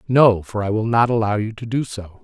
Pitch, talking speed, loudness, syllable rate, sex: 110 Hz, 270 wpm, -19 LUFS, 5.3 syllables/s, male